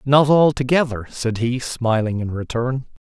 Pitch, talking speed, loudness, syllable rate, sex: 125 Hz, 135 wpm, -19 LUFS, 4.4 syllables/s, male